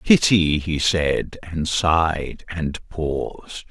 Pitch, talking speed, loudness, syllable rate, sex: 80 Hz, 115 wpm, -21 LUFS, 2.9 syllables/s, male